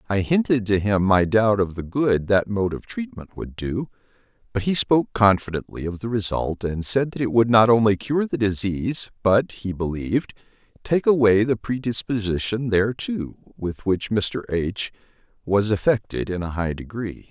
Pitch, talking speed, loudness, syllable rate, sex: 105 Hz, 175 wpm, -22 LUFS, 4.8 syllables/s, male